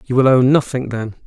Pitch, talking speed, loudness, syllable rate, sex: 125 Hz, 235 wpm, -16 LUFS, 5.6 syllables/s, male